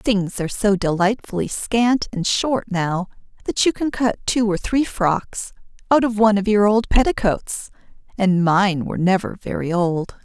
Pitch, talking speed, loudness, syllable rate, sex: 205 Hz, 165 wpm, -19 LUFS, 4.4 syllables/s, female